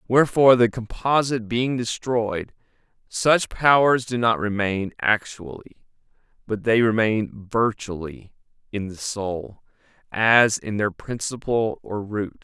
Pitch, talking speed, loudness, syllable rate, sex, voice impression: 110 Hz, 115 wpm, -22 LUFS, 3.9 syllables/s, male, masculine, adult-like, slightly thick, slightly cool, slightly unique